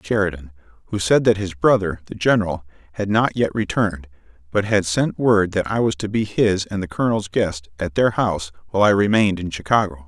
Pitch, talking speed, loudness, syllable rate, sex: 95 Hz, 200 wpm, -20 LUFS, 5.8 syllables/s, male